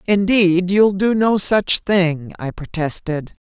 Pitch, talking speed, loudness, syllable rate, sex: 185 Hz, 140 wpm, -17 LUFS, 3.4 syllables/s, female